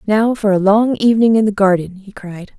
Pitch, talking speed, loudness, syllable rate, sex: 205 Hz, 230 wpm, -14 LUFS, 5.4 syllables/s, female